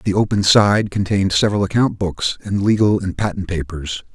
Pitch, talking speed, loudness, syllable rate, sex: 100 Hz, 175 wpm, -18 LUFS, 5.3 syllables/s, male